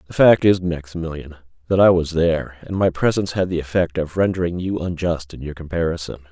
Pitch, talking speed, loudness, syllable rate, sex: 85 Hz, 200 wpm, -20 LUFS, 6.0 syllables/s, male